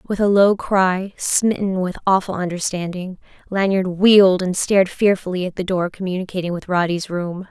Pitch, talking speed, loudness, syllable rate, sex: 185 Hz, 160 wpm, -18 LUFS, 5.0 syllables/s, female